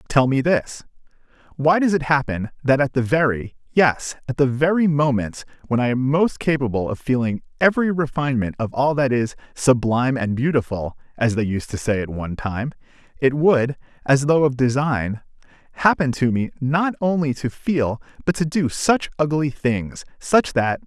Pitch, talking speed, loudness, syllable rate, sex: 135 Hz, 175 wpm, -20 LUFS, 4.8 syllables/s, male